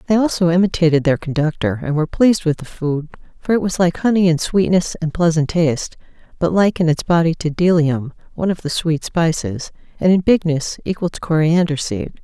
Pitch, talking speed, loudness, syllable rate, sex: 165 Hz, 195 wpm, -17 LUFS, 5.6 syllables/s, female